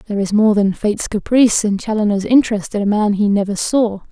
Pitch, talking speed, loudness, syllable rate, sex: 210 Hz, 220 wpm, -16 LUFS, 6.2 syllables/s, female